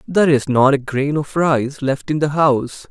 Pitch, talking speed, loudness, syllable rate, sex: 145 Hz, 230 wpm, -17 LUFS, 4.7 syllables/s, male